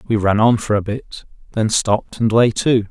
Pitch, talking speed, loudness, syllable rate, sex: 110 Hz, 225 wpm, -17 LUFS, 4.9 syllables/s, male